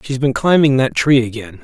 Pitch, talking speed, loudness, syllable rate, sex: 130 Hz, 260 wpm, -15 LUFS, 5.9 syllables/s, male